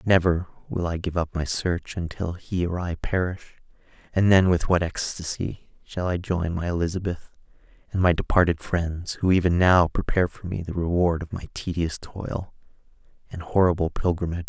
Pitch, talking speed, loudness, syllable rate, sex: 85 Hz, 170 wpm, -24 LUFS, 5.2 syllables/s, male